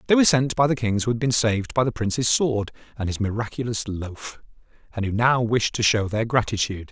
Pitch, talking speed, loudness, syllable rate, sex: 115 Hz, 225 wpm, -22 LUFS, 5.9 syllables/s, male